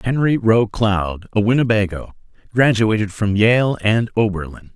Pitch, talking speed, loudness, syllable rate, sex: 110 Hz, 125 wpm, -17 LUFS, 4.4 syllables/s, male